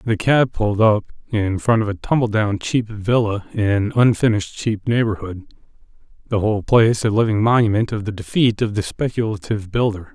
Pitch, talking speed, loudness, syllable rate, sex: 110 Hz, 165 wpm, -19 LUFS, 5.5 syllables/s, male